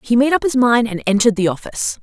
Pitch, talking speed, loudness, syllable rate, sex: 235 Hz, 265 wpm, -16 LUFS, 7.0 syllables/s, female